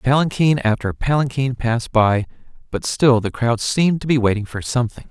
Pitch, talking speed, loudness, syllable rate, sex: 125 Hz, 175 wpm, -19 LUFS, 5.5 syllables/s, male